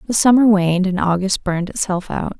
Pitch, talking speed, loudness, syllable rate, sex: 195 Hz, 200 wpm, -17 LUFS, 5.9 syllables/s, female